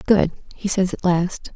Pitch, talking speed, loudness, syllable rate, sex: 185 Hz, 195 wpm, -21 LUFS, 4.3 syllables/s, female